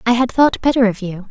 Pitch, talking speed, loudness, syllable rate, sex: 230 Hz, 275 wpm, -15 LUFS, 5.9 syllables/s, female